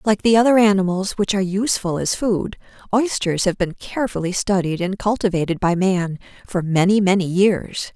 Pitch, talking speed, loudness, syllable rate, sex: 195 Hz, 165 wpm, -19 LUFS, 5.3 syllables/s, female